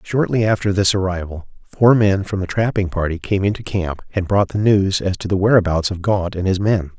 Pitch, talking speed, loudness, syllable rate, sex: 95 Hz, 225 wpm, -18 LUFS, 5.3 syllables/s, male